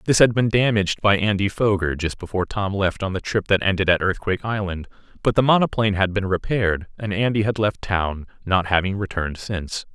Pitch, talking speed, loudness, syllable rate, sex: 100 Hz, 205 wpm, -21 LUFS, 6.0 syllables/s, male